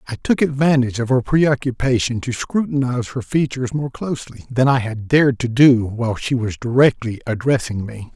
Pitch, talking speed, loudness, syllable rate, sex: 125 Hz, 175 wpm, -18 LUFS, 5.4 syllables/s, male